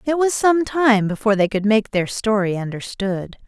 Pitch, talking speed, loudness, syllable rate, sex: 220 Hz, 190 wpm, -19 LUFS, 4.9 syllables/s, female